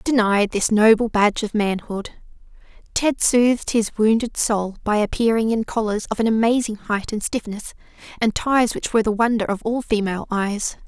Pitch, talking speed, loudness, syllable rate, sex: 220 Hz, 170 wpm, -20 LUFS, 5.0 syllables/s, female